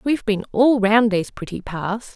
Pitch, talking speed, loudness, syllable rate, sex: 215 Hz, 220 wpm, -19 LUFS, 5.1 syllables/s, female